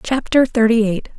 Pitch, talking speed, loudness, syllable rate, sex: 230 Hz, 150 wpm, -16 LUFS, 4.8 syllables/s, female